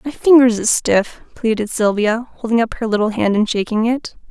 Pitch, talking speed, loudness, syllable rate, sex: 225 Hz, 195 wpm, -16 LUFS, 5.2 syllables/s, female